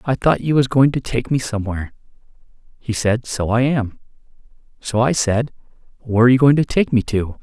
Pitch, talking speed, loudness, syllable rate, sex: 120 Hz, 200 wpm, -18 LUFS, 5.7 syllables/s, male